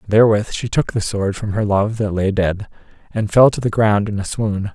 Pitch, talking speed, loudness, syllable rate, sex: 105 Hz, 255 wpm, -18 LUFS, 5.2 syllables/s, male